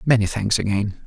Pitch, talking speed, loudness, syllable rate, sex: 105 Hz, 170 wpm, -21 LUFS, 5.3 syllables/s, male